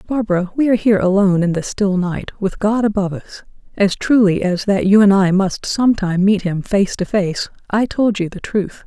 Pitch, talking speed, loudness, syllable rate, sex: 200 Hz, 215 wpm, -16 LUFS, 5.4 syllables/s, female